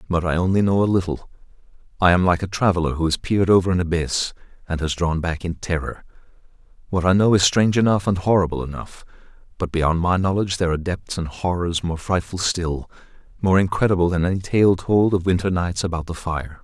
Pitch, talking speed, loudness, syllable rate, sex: 90 Hz, 200 wpm, -20 LUFS, 6.0 syllables/s, male